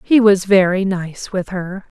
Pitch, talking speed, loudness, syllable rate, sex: 190 Hz, 180 wpm, -16 LUFS, 3.9 syllables/s, female